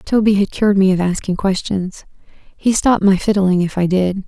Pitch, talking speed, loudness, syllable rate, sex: 195 Hz, 195 wpm, -16 LUFS, 5.0 syllables/s, female